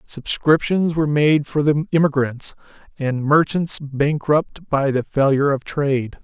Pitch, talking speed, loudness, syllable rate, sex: 145 Hz, 135 wpm, -19 LUFS, 4.3 syllables/s, male